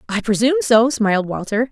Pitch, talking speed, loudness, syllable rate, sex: 235 Hz, 175 wpm, -17 LUFS, 6.2 syllables/s, female